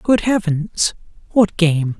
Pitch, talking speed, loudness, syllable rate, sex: 185 Hz, 90 wpm, -17 LUFS, 3.3 syllables/s, male